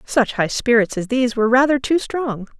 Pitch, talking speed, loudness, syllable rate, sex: 245 Hz, 210 wpm, -18 LUFS, 5.5 syllables/s, female